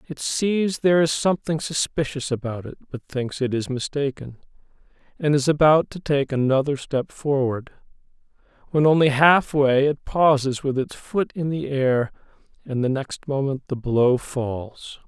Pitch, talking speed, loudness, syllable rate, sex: 140 Hz, 155 wpm, -22 LUFS, 4.5 syllables/s, male